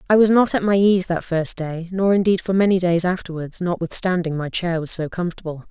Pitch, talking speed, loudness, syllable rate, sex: 175 Hz, 220 wpm, -19 LUFS, 5.6 syllables/s, female